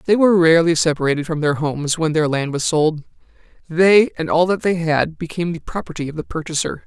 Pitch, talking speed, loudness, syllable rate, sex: 160 Hz, 210 wpm, -18 LUFS, 6.1 syllables/s, male